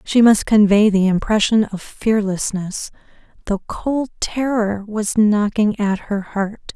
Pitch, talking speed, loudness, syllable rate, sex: 210 Hz, 135 wpm, -18 LUFS, 3.8 syllables/s, female